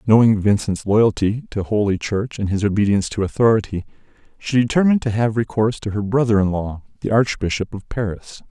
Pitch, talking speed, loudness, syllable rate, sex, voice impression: 105 Hz, 175 wpm, -19 LUFS, 5.8 syllables/s, male, masculine, adult-like, thick, slightly relaxed, soft, muffled, raspy, calm, slightly mature, friendly, reassuring, wild, kind, modest